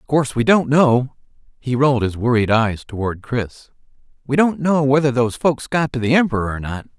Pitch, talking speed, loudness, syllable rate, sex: 130 Hz, 200 wpm, -18 LUFS, 5.4 syllables/s, male